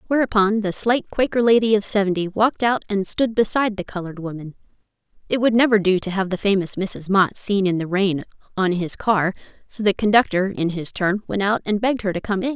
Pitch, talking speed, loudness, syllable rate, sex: 200 Hz, 220 wpm, -20 LUFS, 5.8 syllables/s, female